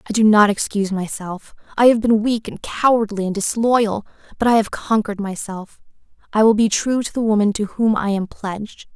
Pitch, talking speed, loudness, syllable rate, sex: 215 Hz, 190 wpm, -18 LUFS, 5.4 syllables/s, female